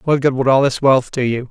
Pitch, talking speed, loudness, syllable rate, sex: 130 Hz, 320 wpm, -15 LUFS, 5.4 syllables/s, male